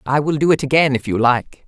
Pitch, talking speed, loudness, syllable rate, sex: 140 Hz, 285 wpm, -16 LUFS, 5.8 syllables/s, female